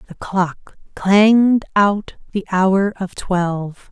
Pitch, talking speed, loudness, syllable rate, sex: 195 Hz, 125 wpm, -17 LUFS, 3.2 syllables/s, female